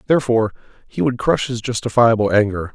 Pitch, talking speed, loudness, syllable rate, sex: 115 Hz, 155 wpm, -18 LUFS, 6.3 syllables/s, male